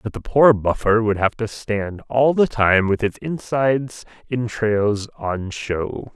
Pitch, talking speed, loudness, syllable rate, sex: 110 Hz, 165 wpm, -20 LUFS, 3.7 syllables/s, male